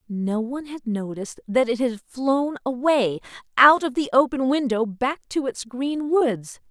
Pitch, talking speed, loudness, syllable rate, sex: 255 Hz, 170 wpm, -22 LUFS, 4.3 syllables/s, female